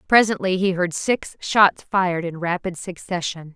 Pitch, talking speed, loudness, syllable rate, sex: 180 Hz, 150 wpm, -21 LUFS, 4.5 syllables/s, female